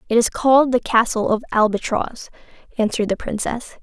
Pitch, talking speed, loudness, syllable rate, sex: 230 Hz, 155 wpm, -19 LUFS, 5.7 syllables/s, female